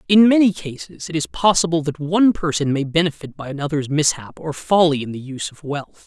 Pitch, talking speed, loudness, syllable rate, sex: 155 Hz, 210 wpm, -19 LUFS, 5.8 syllables/s, male